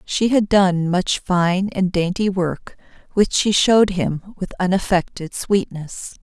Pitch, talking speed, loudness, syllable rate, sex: 185 Hz, 145 wpm, -19 LUFS, 3.8 syllables/s, female